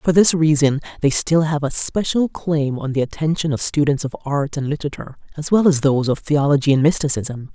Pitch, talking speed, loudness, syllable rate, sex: 150 Hz, 205 wpm, -18 LUFS, 5.7 syllables/s, female